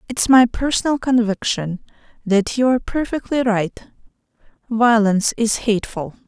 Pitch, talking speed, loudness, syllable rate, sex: 225 Hz, 105 wpm, -18 LUFS, 4.8 syllables/s, female